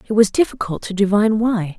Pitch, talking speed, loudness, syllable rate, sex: 210 Hz, 200 wpm, -18 LUFS, 6.3 syllables/s, female